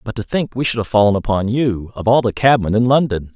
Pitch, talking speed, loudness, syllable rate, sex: 115 Hz, 270 wpm, -16 LUFS, 5.9 syllables/s, male